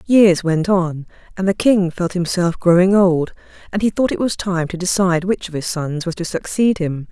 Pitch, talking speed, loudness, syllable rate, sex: 180 Hz, 220 wpm, -17 LUFS, 4.9 syllables/s, female